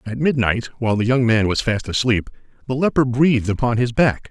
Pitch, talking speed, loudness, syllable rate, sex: 120 Hz, 210 wpm, -19 LUFS, 5.7 syllables/s, male